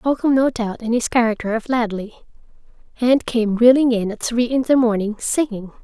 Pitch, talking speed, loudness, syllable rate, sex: 235 Hz, 175 wpm, -18 LUFS, 5.3 syllables/s, female